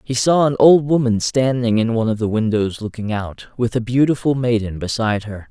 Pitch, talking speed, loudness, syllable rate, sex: 115 Hz, 205 wpm, -18 LUFS, 5.5 syllables/s, male